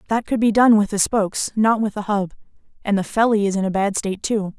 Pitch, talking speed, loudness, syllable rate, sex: 205 Hz, 260 wpm, -19 LUFS, 6.0 syllables/s, female